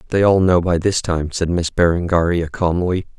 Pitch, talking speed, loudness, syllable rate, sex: 90 Hz, 190 wpm, -17 LUFS, 4.9 syllables/s, male